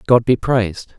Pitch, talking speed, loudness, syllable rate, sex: 115 Hz, 185 wpm, -17 LUFS, 5.4 syllables/s, male